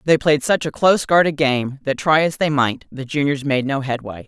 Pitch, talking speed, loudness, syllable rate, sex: 145 Hz, 240 wpm, -18 LUFS, 5.2 syllables/s, female